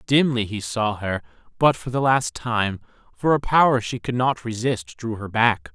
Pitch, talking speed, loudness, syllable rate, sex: 115 Hz, 200 wpm, -22 LUFS, 4.5 syllables/s, male